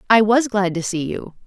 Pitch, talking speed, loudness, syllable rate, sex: 205 Hz, 245 wpm, -18 LUFS, 5.0 syllables/s, female